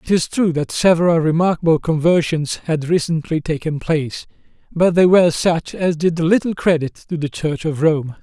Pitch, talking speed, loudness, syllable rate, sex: 165 Hz, 175 wpm, -17 LUFS, 5.0 syllables/s, male